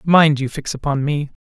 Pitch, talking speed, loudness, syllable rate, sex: 145 Hz, 210 wpm, -18 LUFS, 4.9 syllables/s, male